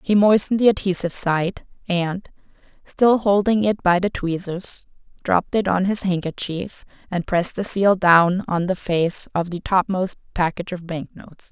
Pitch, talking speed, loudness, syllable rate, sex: 185 Hz, 160 wpm, -20 LUFS, 4.8 syllables/s, female